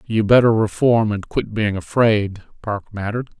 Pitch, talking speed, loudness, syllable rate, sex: 110 Hz, 160 wpm, -18 LUFS, 4.8 syllables/s, male